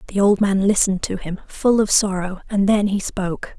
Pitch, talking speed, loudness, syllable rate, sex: 195 Hz, 220 wpm, -19 LUFS, 5.3 syllables/s, female